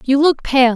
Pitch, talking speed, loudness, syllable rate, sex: 270 Hz, 240 wpm, -15 LUFS, 4.3 syllables/s, female